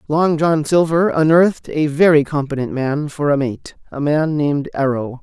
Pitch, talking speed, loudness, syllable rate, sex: 150 Hz, 170 wpm, -17 LUFS, 4.7 syllables/s, male